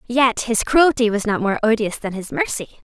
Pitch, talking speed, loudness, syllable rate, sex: 230 Hz, 205 wpm, -19 LUFS, 4.9 syllables/s, female